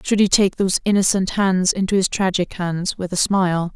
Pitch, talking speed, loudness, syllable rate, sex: 190 Hz, 210 wpm, -19 LUFS, 5.3 syllables/s, female